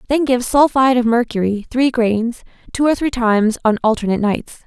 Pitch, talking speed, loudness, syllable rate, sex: 240 Hz, 180 wpm, -16 LUFS, 5.5 syllables/s, female